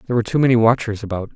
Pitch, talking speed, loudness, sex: 115 Hz, 265 wpm, -18 LUFS, male